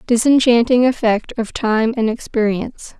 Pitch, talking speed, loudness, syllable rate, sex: 235 Hz, 120 wpm, -16 LUFS, 4.7 syllables/s, female